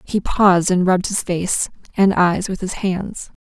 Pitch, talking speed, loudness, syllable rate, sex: 185 Hz, 190 wpm, -18 LUFS, 4.4 syllables/s, female